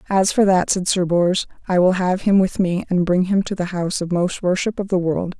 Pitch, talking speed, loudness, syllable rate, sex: 185 Hz, 265 wpm, -19 LUFS, 5.3 syllables/s, female